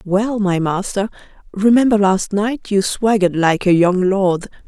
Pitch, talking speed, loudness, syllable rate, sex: 195 Hz, 155 wpm, -16 LUFS, 4.3 syllables/s, female